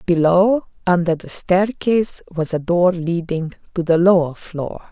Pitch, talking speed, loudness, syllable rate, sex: 175 Hz, 145 wpm, -18 LUFS, 4.2 syllables/s, female